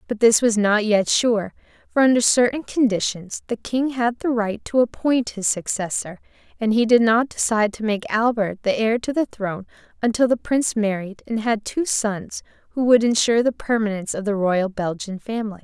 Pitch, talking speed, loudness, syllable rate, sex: 220 Hz, 190 wpm, -20 LUFS, 5.1 syllables/s, female